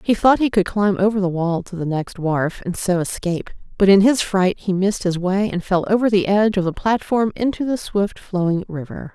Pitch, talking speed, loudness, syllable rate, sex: 195 Hz, 235 wpm, -19 LUFS, 5.3 syllables/s, female